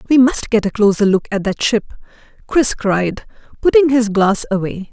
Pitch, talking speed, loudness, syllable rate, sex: 225 Hz, 185 wpm, -15 LUFS, 4.7 syllables/s, female